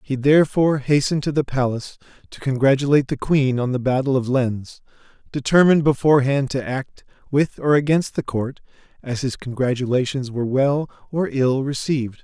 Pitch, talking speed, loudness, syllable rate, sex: 135 Hz, 155 wpm, -20 LUFS, 5.6 syllables/s, male